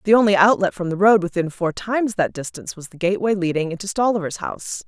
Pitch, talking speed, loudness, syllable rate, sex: 190 Hz, 220 wpm, -20 LUFS, 6.5 syllables/s, female